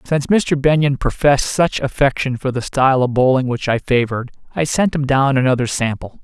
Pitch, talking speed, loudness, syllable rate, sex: 135 Hz, 195 wpm, -17 LUFS, 5.6 syllables/s, male